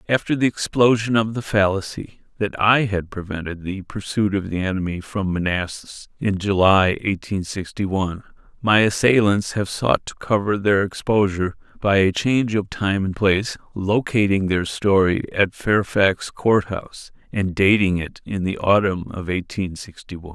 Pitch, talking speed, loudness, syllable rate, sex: 100 Hz, 160 wpm, -20 LUFS, 4.7 syllables/s, male